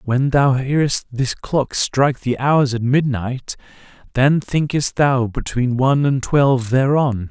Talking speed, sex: 150 wpm, male